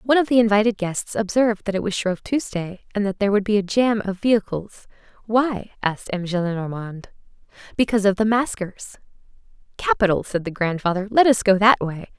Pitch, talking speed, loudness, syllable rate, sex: 205 Hz, 165 wpm, -21 LUFS, 5.9 syllables/s, female